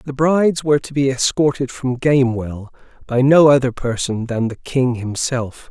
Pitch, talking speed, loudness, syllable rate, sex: 130 Hz, 170 wpm, -17 LUFS, 4.7 syllables/s, male